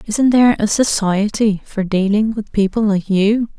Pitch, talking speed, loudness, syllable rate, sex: 210 Hz, 165 wpm, -16 LUFS, 4.5 syllables/s, female